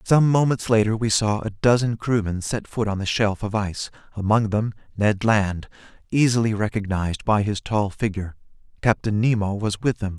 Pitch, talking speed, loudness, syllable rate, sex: 105 Hz, 175 wpm, -22 LUFS, 5.2 syllables/s, male